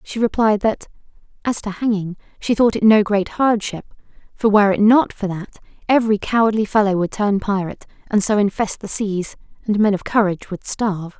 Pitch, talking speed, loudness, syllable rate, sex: 205 Hz, 190 wpm, -18 LUFS, 5.6 syllables/s, female